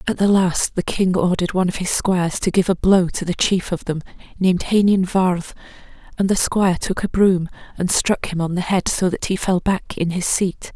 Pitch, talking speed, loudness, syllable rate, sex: 185 Hz, 235 wpm, -19 LUFS, 5.3 syllables/s, female